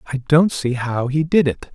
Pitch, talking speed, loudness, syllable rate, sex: 140 Hz, 240 wpm, -18 LUFS, 4.8 syllables/s, male